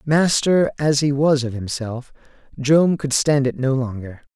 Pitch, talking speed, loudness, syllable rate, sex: 135 Hz, 165 wpm, -19 LUFS, 4.1 syllables/s, male